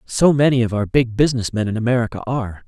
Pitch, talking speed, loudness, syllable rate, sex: 120 Hz, 225 wpm, -18 LUFS, 6.6 syllables/s, male